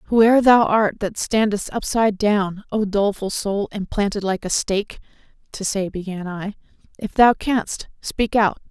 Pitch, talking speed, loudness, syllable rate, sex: 205 Hz, 160 wpm, -20 LUFS, 4.7 syllables/s, female